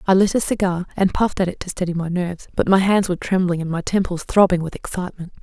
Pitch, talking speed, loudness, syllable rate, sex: 185 Hz, 255 wpm, -20 LUFS, 6.8 syllables/s, female